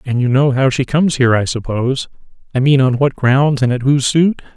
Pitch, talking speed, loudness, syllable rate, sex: 135 Hz, 235 wpm, -14 LUFS, 5.9 syllables/s, male